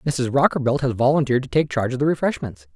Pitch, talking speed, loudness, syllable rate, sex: 135 Hz, 220 wpm, -20 LUFS, 7.0 syllables/s, male